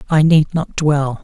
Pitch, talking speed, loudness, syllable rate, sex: 150 Hz, 195 wpm, -15 LUFS, 3.9 syllables/s, male